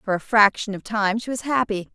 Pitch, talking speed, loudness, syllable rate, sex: 210 Hz, 245 wpm, -21 LUFS, 5.5 syllables/s, female